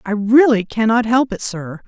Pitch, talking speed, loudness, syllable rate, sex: 225 Hz, 190 wpm, -15 LUFS, 4.6 syllables/s, female